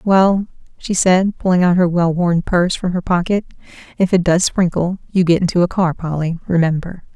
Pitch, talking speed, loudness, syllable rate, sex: 180 Hz, 195 wpm, -16 LUFS, 5.2 syllables/s, female